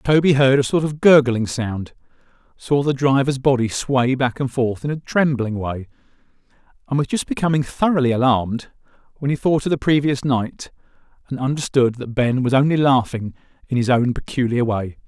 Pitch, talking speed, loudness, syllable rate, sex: 130 Hz, 175 wpm, -19 LUFS, 5.2 syllables/s, male